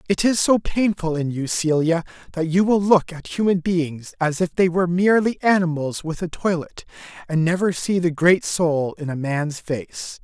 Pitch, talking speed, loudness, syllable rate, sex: 170 Hz, 195 wpm, -21 LUFS, 4.7 syllables/s, male